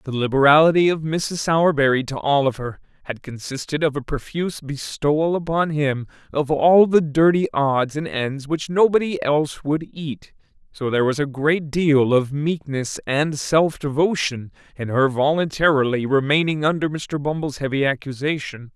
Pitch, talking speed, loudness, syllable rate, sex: 145 Hz, 150 wpm, -20 LUFS, 4.8 syllables/s, male